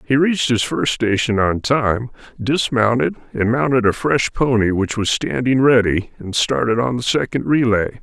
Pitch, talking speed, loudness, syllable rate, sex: 120 Hz, 170 wpm, -17 LUFS, 4.7 syllables/s, male